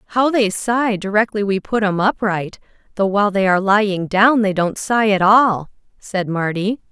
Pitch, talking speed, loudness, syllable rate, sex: 205 Hz, 180 wpm, -17 LUFS, 4.8 syllables/s, female